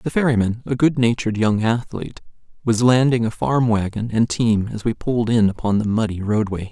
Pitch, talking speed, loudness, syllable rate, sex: 115 Hz, 190 wpm, -19 LUFS, 5.5 syllables/s, male